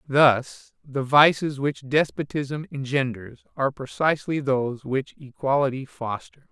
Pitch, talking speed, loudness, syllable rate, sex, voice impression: 135 Hz, 110 wpm, -24 LUFS, 4.4 syllables/s, male, masculine, adult-like, slightly refreshing, unique, slightly lively